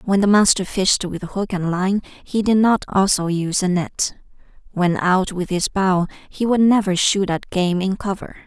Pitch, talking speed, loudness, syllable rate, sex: 190 Hz, 200 wpm, -19 LUFS, 4.3 syllables/s, female